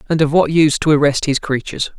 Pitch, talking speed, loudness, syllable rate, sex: 150 Hz, 240 wpm, -15 LUFS, 6.9 syllables/s, male